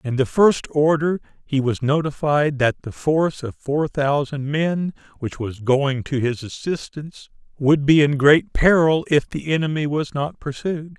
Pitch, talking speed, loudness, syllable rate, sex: 145 Hz, 170 wpm, -20 LUFS, 4.3 syllables/s, male